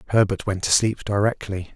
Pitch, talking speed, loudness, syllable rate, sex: 100 Hz, 170 wpm, -22 LUFS, 5.4 syllables/s, male